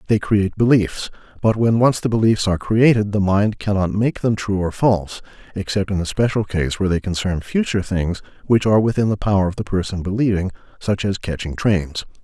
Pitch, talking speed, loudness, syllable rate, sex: 100 Hz, 200 wpm, -19 LUFS, 5.7 syllables/s, male